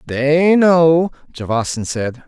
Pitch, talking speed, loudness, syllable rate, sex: 145 Hz, 105 wpm, -15 LUFS, 3.1 syllables/s, male